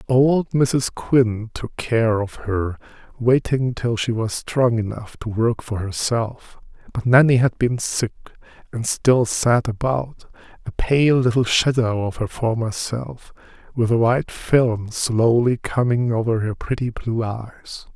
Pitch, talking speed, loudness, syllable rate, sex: 120 Hz, 150 wpm, -20 LUFS, 3.7 syllables/s, male